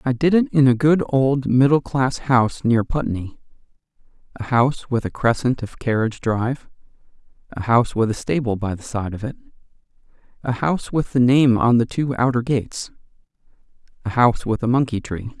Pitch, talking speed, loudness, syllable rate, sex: 125 Hz, 180 wpm, -20 LUFS, 5.5 syllables/s, male